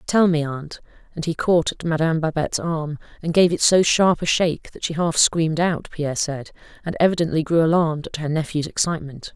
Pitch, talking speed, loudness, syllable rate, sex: 160 Hz, 205 wpm, -20 LUFS, 5.9 syllables/s, female